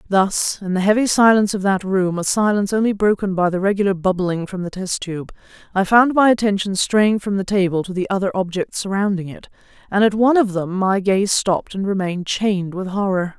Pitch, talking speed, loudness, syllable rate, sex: 195 Hz, 210 wpm, -18 LUFS, 5.7 syllables/s, female